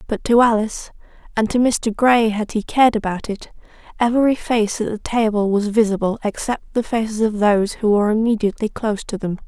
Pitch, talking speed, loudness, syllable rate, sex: 220 Hz, 175 wpm, -18 LUFS, 5.8 syllables/s, female